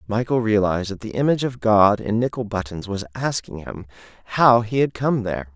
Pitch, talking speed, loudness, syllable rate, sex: 110 Hz, 195 wpm, -21 LUFS, 5.6 syllables/s, male